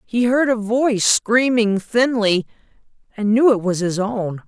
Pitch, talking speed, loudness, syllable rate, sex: 220 Hz, 160 wpm, -18 LUFS, 4.2 syllables/s, female